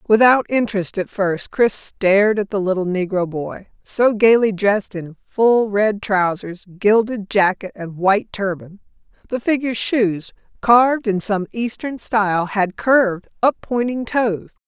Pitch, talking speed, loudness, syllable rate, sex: 210 Hz, 145 wpm, -18 LUFS, 4.3 syllables/s, female